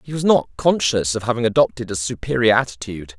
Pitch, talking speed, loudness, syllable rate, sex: 115 Hz, 190 wpm, -19 LUFS, 6.3 syllables/s, male